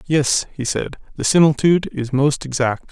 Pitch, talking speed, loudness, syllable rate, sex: 140 Hz, 165 wpm, -18 LUFS, 5.4 syllables/s, male